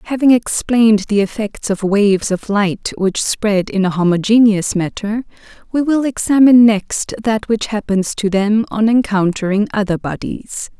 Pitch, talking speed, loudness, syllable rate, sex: 210 Hz, 150 wpm, -15 LUFS, 4.5 syllables/s, female